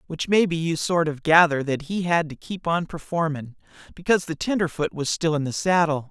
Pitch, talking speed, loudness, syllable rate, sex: 160 Hz, 205 wpm, -23 LUFS, 5.4 syllables/s, male